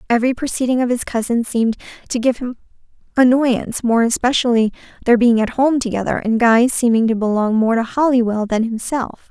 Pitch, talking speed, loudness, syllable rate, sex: 235 Hz, 175 wpm, -17 LUFS, 5.7 syllables/s, female